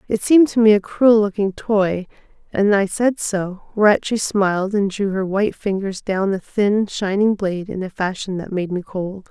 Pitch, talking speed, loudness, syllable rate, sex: 200 Hz, 200 wpm, -19 LUFS, 4.8 syllables/s, female